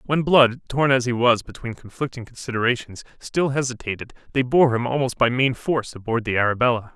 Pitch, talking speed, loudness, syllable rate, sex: 125 Hz, 180 wpm, -21 LUFS, 5.7 syllables/s, male